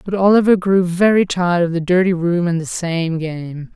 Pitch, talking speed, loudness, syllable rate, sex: 175 Hz, 210 wpm, -16 LUFS, 4.9 syllables/s, female